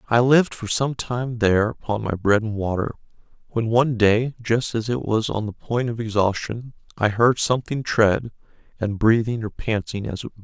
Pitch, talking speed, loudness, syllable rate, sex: 115 Hz, 195 wpm, -22 LUFS, 5.2 syllables/s, male